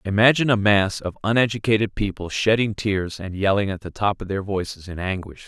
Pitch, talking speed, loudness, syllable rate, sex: 100 Hz, 195 wpm, -22 LUFS, 5.7 syllables/s, male